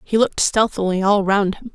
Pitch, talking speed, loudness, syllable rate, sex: 200 Hz, 205 wpm, -18 LUFS, 5.5 syllables/s, female